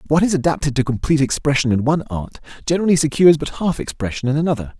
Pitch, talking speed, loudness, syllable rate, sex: 145 Hz, 200 wpm, -18 LUFS, 7.3 syllables/s, male